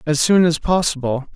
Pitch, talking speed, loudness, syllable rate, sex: 155 Hz, 175 wpm, -17 LUFS, 5.1 syllables/s, male